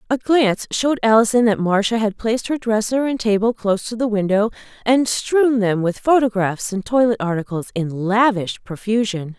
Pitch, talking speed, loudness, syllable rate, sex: 220 Hz, 175 wpm, -18 LUFS, 5.2 syllables/s, female